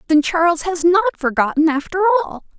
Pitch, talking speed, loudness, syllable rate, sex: 340 Hz, 160 wpm, -17 LUFS, 5.8 syllables/s, female